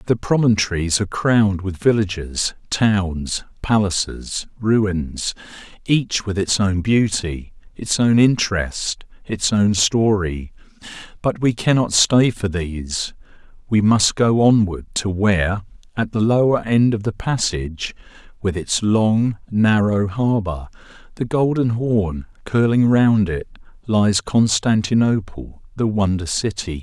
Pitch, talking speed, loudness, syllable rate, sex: 105 Hz, 125 wpm, -19 LUFS, 3.9 syllables/s, male